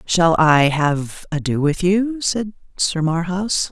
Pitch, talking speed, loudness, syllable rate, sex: 175 Hz, 145 wpm, -18 LUFS, 3.3 syllables/s, female